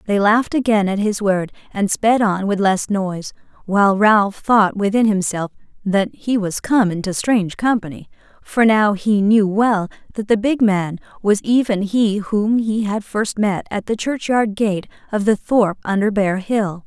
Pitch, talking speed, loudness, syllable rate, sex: 205 Hz, 180 wpm, -18 LUFS, 4.4 syllables/s, female